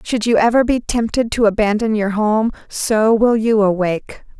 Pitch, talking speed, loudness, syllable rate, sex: 220 Hz, 175 wpm, -16 LUFS, 4.7 syllables/s, female